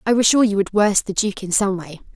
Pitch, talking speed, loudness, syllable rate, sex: 200 Hz, 305 wpm, -18 LUFS, 5.8 syllables/s, female